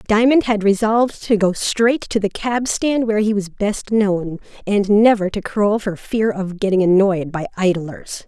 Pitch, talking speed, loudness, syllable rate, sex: 205 Hz, 190 wpm, -18 LUFS, 4.4 syllables/s, female